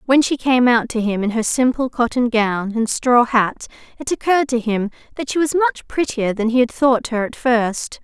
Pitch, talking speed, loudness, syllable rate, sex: 240 Hz, 225 wpm, -18 LUFS, 5.0 syllables/s, female